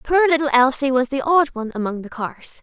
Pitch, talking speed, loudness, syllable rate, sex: 265 Hz, 230 wpm, -19 LUFS, 5.7 syllables/s, female